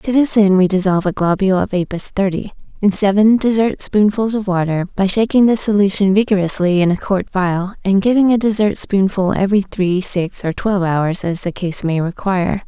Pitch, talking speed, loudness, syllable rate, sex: 195 Hz, 195 wpm, -16 LUFS, 5.4 syllables/s, female